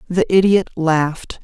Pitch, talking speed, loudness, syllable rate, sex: 175 Hz, 125 wpm, -16 LUFS, 4.2 syllables/s, female